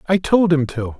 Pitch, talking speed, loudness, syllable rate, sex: 155 Hz, 240 wpm, -17 LUFS, 5.0 syllables/s, male